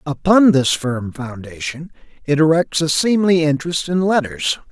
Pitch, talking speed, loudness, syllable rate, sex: 155 Hz, 140 wpm, -17 LUFS, 4.6 syllables/s, male